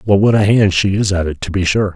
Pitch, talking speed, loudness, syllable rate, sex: 95 Hz, 340 wpm, -14 LUFS, 6.1 syllables/s, male